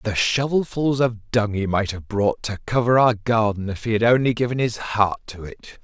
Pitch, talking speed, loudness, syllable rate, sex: 110 Hz, 215 wpm, -21 LUFS, 4.8 syllables/s, male